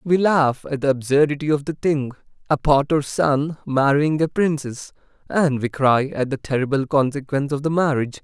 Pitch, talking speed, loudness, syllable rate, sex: 145 Hz, 170 wpm, -20 LUFS, 5.1 syllables/s, male